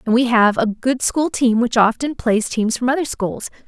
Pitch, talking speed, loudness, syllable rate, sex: 240 Hz, 230 wpm, -18 LUFS, 4.8 syllables/s, female